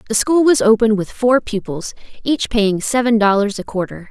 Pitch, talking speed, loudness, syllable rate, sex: 220 Hz, 190 wpm, -16 LUFS, 5.2 syllables/s, female